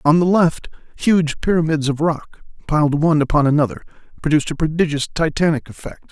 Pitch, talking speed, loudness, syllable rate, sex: 155 Hz, 155 wpm, -18 LUFS, 5.9 syllables/s, male